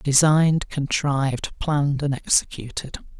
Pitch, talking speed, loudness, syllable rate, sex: 140 Hz, 95 wpm, -22 LUFS, 4.3 syllables/s, male